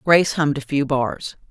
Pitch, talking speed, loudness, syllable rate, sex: 145 Hz, 200 wpm, -20 LUFS, 5.4 syllables/s, female